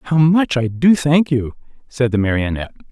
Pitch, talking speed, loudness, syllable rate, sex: 135 Hz, 185 wpm, -16 LUFS, 5.0 syllables/s, male